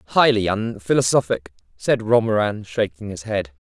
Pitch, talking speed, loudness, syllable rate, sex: 105 Hz, 115 wpm, -20 LUFS, 4.6 syllables/s, male